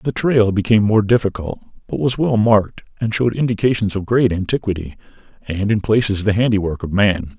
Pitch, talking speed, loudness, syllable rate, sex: 105 Hz, 180 wpm, -17 LUFS, 5.8 syllables/s, male